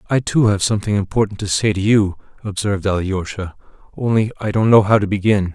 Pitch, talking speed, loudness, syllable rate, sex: 100 Hz, 195 wpm, -17 LUFS, 6.1 syllables/s, male